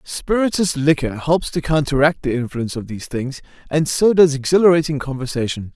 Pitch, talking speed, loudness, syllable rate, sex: 145 Hz, 155 wpm, -18 LUFS, 5.6 syllables/s, male